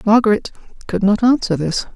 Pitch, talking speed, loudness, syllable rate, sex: 210 Hz, 155 wpm, -17 LUFS, 5.6 syllables/s, female